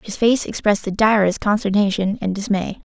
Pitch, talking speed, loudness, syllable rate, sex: 205 Hz, 165 wpm, -19 LUFS, 5.6 syllables/s, female